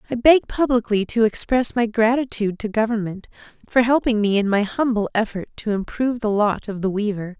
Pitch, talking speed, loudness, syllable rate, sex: 220 Hz, 185 wpm, -20 LUFS, 5.6 syllables/s, female